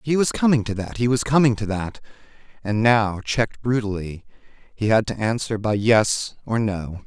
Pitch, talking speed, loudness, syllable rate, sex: 110 Hz, 180 wpm, -21 LUFS, 4.9 syllables/s, male